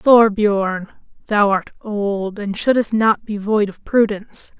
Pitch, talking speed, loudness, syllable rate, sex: 210 Hz, 145 wpm, -18 LUFS, 3.7 syllables/s, female